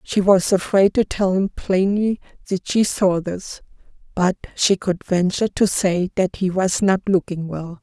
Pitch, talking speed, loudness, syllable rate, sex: 190 Hz, 175 wpm, -19 LUFS, 4.2 syllables/s, female